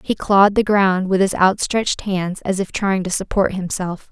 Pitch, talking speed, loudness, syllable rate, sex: 190 Hz, 205 wpm, -18 LUFS, 4.8 syllables/s, female